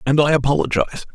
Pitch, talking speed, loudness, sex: 135 Hz, 155 wpm, -18 LUFS, male